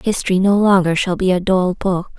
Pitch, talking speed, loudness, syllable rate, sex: 185 Hz, 220 wpm, -16 LUFS, 5.2 syllables/s, female